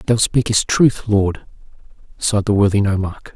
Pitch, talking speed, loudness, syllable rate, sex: 105 Hz, 145 wpm, -17 LUFS, 5.1 syllables/s, male